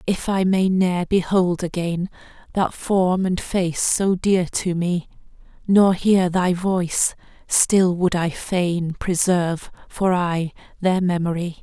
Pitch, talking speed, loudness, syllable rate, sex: 180 Hz, 140 wpm, -20 LUFS, 3.6 syllables/s, female